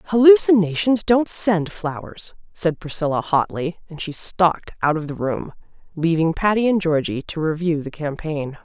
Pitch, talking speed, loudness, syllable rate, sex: 170 Hz, 155 wpm, -20 LUFS, 4.7 syllables/s, female